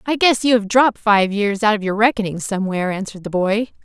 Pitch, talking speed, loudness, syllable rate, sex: 210 Hz, 235 wpm, -17 LUFS, 6.3 syllables/s, female